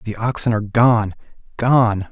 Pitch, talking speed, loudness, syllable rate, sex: 110 Hz, 85 wpm, -17 LUFS, 4.4 syllables/s, male